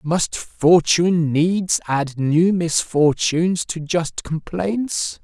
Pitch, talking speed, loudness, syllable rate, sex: 160 Hz, 105 wpm, -19 LUFS, 3.0 syllables/s, male